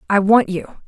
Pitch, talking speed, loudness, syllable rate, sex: 205 Hz, 205 wpm, -16 LUFS, 4.5 syllables/s, female